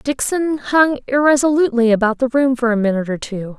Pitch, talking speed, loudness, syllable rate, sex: 255 Hz, 185 wpm, -16 LUFS, 5.8 syllables/s, female